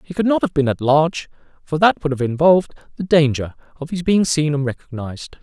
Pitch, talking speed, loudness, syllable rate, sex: 150 Hz, 220 wpm, -18 LUFS, 6.0 syllables/s, male